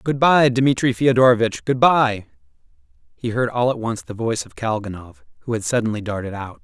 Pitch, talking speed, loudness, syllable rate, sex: 115 Hz, 180 wpm, -19 LUFS, 5.5 syllables/s, male